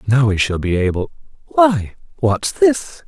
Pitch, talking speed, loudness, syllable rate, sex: 110 Hz, 135 wpm, -17 LUFS, 3.8 syllables/s, male